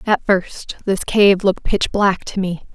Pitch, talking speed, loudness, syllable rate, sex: 195 Hz, 195 wpm, -17 LUFS, 4.1 syllables/s, female